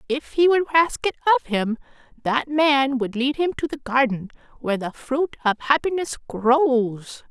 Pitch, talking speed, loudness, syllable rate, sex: 270 Hz, 170 wpm, -21 LUFS, 4.4 syllables/s, female